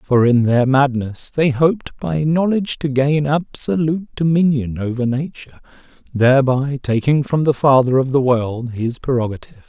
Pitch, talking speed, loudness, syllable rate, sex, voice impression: 135 Hz, 150 wpm, -17 LUFS, 5.0 syllables/s, male, very masculine, very adult-like, very middle-aged, thick, slightly relaxed, slightly weak, slightly dark, soft, slightly muffled, fluent, slightly raspy, cool, very intellectual, slightly refreshing, sincere, calm, friendly, reassuring, unique, elegant, wild, slightly sweet, lively, very kind, modest, slightly light